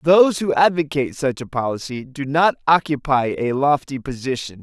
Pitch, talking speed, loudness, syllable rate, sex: 140 Hz, 155 wpm, -19 LUFS, 5.3 syllables/s, male